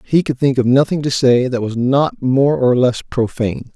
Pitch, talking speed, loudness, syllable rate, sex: 130 Hz, 225 wpm, -15 LUFS, 5.0 syllables/s, male